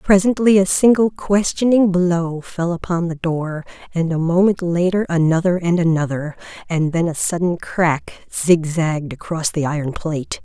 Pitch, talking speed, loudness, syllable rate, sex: 170 Hz, 150 wpm, -18 LUFS, 4.6 syllables/s, female